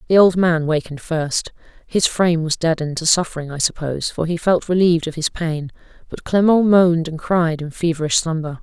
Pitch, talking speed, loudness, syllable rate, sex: 165 Hz, 195 wpm, -18 LUFS, 5.7 syllables/s, female